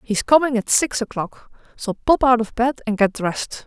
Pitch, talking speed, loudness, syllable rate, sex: 235 Hz, 230 wpm, -19 LUFS, 5.4 syllables/s, female